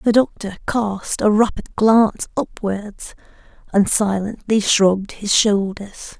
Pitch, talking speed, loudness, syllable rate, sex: 210 Hz, 115 wpm, -18 LUFS, 3.9 syllables/s, female